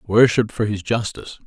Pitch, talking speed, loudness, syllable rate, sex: 110 Hz, 165 wpm, -19 LUFS, 5.8 syllables/s, male